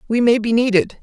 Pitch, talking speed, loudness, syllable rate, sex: 230 Hz, 235 wpm, -16 LUFS, 5.9 syllables/s, female